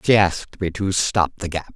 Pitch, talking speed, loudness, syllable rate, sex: 90 Hz, 240 wpm, -21 LUFS, 4.9 syllables/s, male